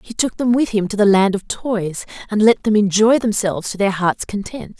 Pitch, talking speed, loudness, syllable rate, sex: 205 Hz, 240 wpm, -17 LUFS, 5.2 syllables/s, female